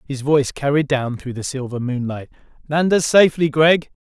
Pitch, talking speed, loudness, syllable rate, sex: 140 Hz, 175 wpm, -18 LUFS, 5.3 syllables/s, male